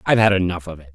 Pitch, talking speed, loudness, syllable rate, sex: 90 Hz, 320 wpm, -18 LUFS, 8.4 syllables/s, male